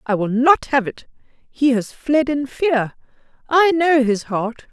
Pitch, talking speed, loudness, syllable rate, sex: 265 Hz, 180 wpm, -18 LUFS, 3.6 syllables/s, female